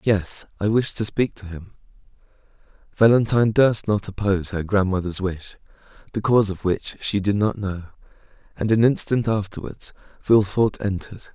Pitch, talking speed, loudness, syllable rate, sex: 100 Hz, 150 wpm, -21 LUFS, 5.2 syllables/s, male